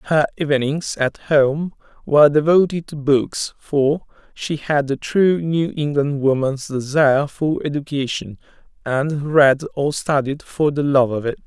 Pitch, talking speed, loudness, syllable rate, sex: 145 Hz, 145 wpm, -19 LUFS, 4.1 syllables/s, male